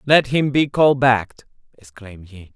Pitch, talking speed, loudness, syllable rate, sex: 120 Hz, 165 wpm, -17 LUFS, 5.1 syllables/s, male